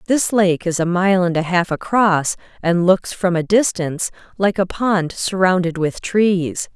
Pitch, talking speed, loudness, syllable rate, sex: 185 Hz, 180 wpm, -18 LUFS, 4.2 syllables/s, female